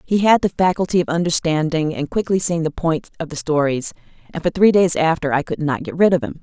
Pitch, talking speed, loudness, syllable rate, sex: 165 Hz, 245 wpm, -18 LUFS, 5.8 syllables/s, female